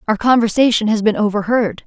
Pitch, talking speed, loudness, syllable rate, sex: 220 Hz, 160 wpm, -15 LUFS, 5.9 syllables/s, female